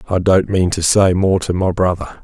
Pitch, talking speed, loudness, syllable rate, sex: 90 Hz, 240 wpm, -15 LUFS, 4.9 syllables/s, male